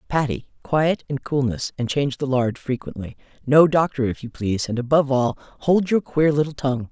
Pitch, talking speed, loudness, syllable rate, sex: 135 Hz, 190 wpm, -21 LUFS, 5.5 syllables/s, female